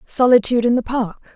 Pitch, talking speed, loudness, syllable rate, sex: 235 Hz, 175 wpm, -17 LUFS, 6.3 syllables/s, female